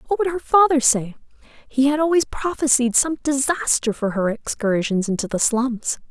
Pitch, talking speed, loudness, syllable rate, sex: 265 Hz, 165 wpm, -19 LUFS, 4.7 syllables/s, female